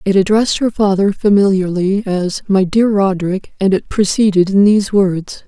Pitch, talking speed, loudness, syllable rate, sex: 195 Hz, 165 wpm, -14 LUFS, 5.0 syllables/s, female